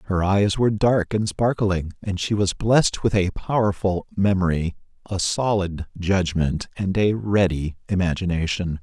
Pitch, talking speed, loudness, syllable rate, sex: 95 Hz, 145 wpm, -22 LUFS, 4.5 syllables/s, male